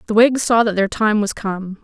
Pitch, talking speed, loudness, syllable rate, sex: 215 Hz, 260 wpm, -17 LUFS, 4.9 syllables/s, female